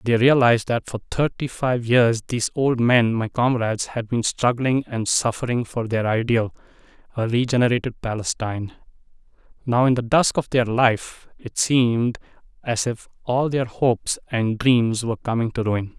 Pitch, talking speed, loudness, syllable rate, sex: 120 Hz, 160 wpm, -21 LUFS, 4.8 syllables/s, male